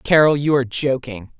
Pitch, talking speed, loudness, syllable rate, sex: 150 Hz, 170 wpm, -18 LUFS, 5.3 syllables/s, female